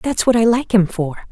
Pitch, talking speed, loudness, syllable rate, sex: 210 Hz, 275 wpm, -16 LUFS, 5.3 syllables/s, female